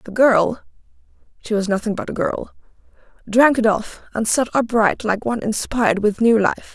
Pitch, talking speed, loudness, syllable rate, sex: 220 Hz, 160 wpm, -19 LUFS, 5.0 syllables/s, female